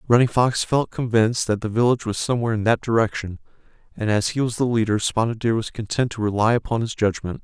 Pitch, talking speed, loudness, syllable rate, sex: 115 Hz, 220 wpm, -21 LUFS, 6.3 syllables/s, male